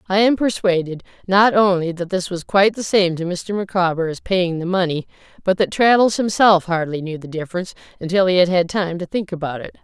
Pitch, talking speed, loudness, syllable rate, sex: 185 Hz, 215 wpm, -18 LUFS, 5.7 syllables/s, female